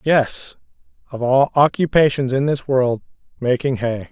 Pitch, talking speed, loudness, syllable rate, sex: 135 Hz, 130 wpm, -18 LUFS, 4.3 syllables/s, male